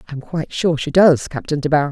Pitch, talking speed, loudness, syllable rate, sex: 150 Hz, 250 wpm, -17 LUFS, 6.1 syllables/s, female